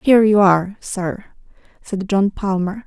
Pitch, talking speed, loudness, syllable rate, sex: 200 Hz, 145 wpm, -18 LUFS, 4.4 syllables/s, female